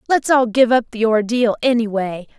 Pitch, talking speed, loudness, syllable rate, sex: 230 Hz, 175 wpm, -17 LUFS, 4.9 syllables/s, female